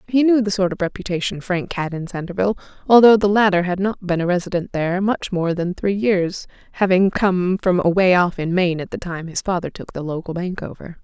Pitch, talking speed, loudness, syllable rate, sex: 185 Hz, 225 wpm, -19 LUFS, 5.7 syllables/s, female